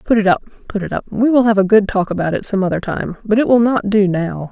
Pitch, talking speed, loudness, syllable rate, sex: 205 Hz, 305 wpm, -16 LUFS, 5.8 syllables/s, female